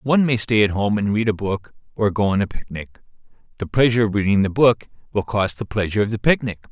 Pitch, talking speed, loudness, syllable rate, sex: 105 Hz, 240 wpm, -20 LUFS, 6.2 syllables/s, male